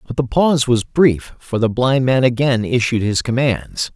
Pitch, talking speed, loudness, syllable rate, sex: 125 Hz, 195 wpm, -16 LUFS, 4.5 syllables/s, male